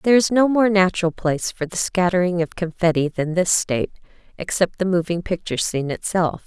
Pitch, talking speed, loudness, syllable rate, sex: 180 Hz, 185 wpm, -20 LUFS, 5.9 syllables/s, female